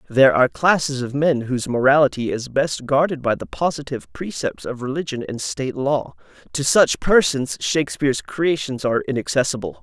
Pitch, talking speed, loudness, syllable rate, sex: 135 Hz, 160 wpm, -20 LUFS, 5.5 syllables/s, male